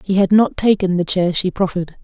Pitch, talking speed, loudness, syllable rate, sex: 190 Hz, 235 wpm, -16 LUFS, 5.8 syllables/s, female